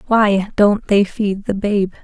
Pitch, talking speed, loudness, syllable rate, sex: 200 Hz, 175 wpm, -16 LUFS, 3.5 syllables/s, female